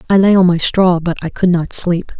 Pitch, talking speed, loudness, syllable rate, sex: 180 Hz, 275 wpm, -13 LUFS, 5.2 syllables/s, female